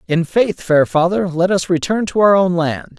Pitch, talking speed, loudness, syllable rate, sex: 180 Hz, 220 wpm, -15 LUFS, 4.6 syllables/s, male